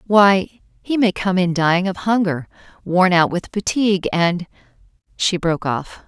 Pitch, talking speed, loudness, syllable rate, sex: 185 Hz, 160 wpm, -18 LUFS, 4.6 syllables/s, female